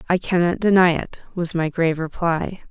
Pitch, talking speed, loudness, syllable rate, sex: 170 Hz, 180 wpm, -20 LUFS, 5.1 syllables/s, female